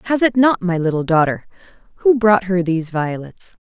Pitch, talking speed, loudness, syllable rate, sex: 190 Hz, 180 wpm, -17 LUFS, 5.3 syllables/s, female